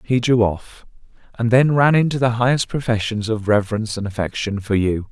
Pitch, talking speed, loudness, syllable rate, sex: 115 Hz, 190 wpm, -19 LUFS, 5.5 syllables/s, male